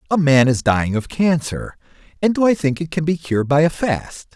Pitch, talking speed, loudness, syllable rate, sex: 150 Hz, 235 wpm, -18 LUFS, 5.5 syllables/s, male